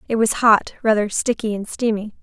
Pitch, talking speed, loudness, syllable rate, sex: 215 Hz, 190 wpm, -19 LUFS, 5.3 syllables/s, female